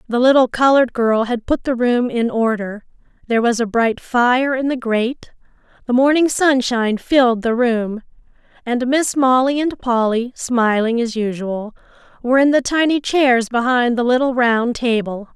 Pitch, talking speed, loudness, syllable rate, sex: 245 Hz, 165 wpm, -17 LUFS, 4.7 syllables/s, female